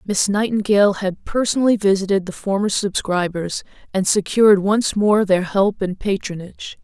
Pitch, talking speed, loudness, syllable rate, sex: 200 Hz, 140 wpm, -18 LUFS, 5.0 syllables/s, female